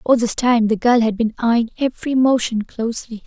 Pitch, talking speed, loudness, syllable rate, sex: 235 Hz, 200 wpm, -18 LUFS, 5.3 syllables/s, female